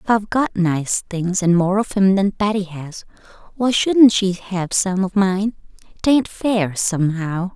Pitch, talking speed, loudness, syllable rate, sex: 195 Hz, 175 wpm, -18 LUFS, 4.1 syllables/s, female